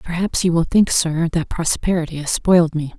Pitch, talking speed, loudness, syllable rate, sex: 165 Hz, 200 wpm, -18 LUFS, 5.3 syllables/s, female